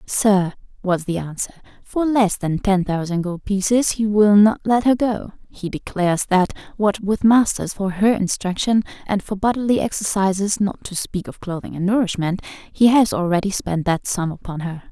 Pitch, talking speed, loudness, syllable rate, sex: 200 Hz, 180 wpm, -19 LUFS, 4.8 syllables/s, female